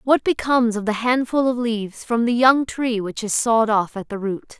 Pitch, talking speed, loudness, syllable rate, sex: 230 Hz, 235 wpm, -20 LUFS, 5.1 syllables/s, female